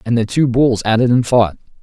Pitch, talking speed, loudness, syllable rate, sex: 115 Hz, 265 wpm, -15 LUFS, 5.3 syllables/s, male